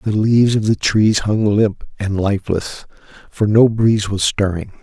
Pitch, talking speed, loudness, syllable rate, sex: 105 Hz, 175 wpm, -16 LUFS, 4.8 syllables/s, male